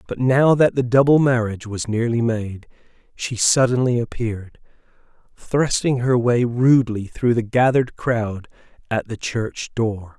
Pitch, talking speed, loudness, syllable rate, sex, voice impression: 120 Hz, 140 wpm, -19 LUFS, 4.4 syllables/s, male, masculine, very adult-like, relaxed, weak, slightly raspy, sincere, calm, kind